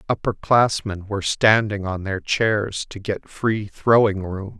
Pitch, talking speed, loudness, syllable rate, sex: 105 Hz, 155 wpm, -21 LUFS, 3.9 syllables/s, male